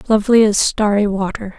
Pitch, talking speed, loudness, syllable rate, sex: 210 Hz, 150 wpm, -15 LUFS, 5.7 syllables/s, female